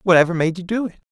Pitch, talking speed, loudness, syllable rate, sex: 180 Hz, 270 wpm, -19 LUFS, 7.5 syllables/s, male